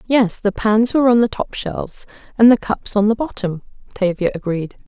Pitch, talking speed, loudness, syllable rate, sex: 215 Hz, 195 wpm, -17 LUFS, 5.2 syllables/s, female